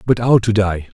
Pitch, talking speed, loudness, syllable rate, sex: 105 Hz, 245 wpm, -15 LUFS, 5.0 syllables/s, male